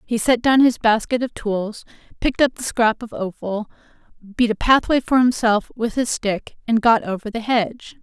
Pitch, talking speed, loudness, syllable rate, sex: 230 Hz, 195 wpm, -19 LUFS, 4.8 syllables/s, female